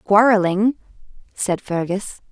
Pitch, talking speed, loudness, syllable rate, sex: 200 Hz, 80 wpm, -19 LUFS, 3.8 syllables/s, female